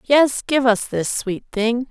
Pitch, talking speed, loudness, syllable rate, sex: 240 Hz, 190 wpm, -19 LUFS, 3.4 syllables/s, female